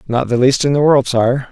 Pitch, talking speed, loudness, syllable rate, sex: 130 Hz, 275 wpm, -14 LUFS, 5.3 syllables/s, male